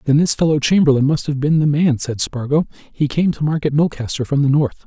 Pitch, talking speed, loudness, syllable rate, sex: 145 Hz, 235 wpm, -17 LUFS, 5.9 syllables/s, male